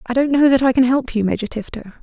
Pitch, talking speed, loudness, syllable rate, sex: 245 Hz, 295 wpm, -17 LUFS, 6.9 syllables/s, female